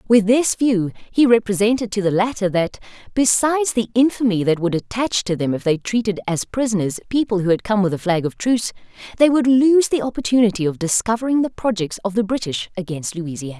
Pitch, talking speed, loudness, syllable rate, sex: 215 Hz, 200 wpm, -19 LUFS, 5.9 syllables/s, female